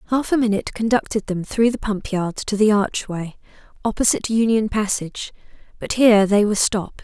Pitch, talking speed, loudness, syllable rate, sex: 210 Hz, 170 wpm, -20 LUFS, 5.8 syllables/s, female